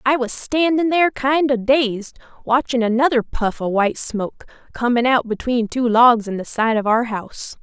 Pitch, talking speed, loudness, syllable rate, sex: 245 Hz, 190 wpm, -18 LUFS, 5.0 syllables/s, female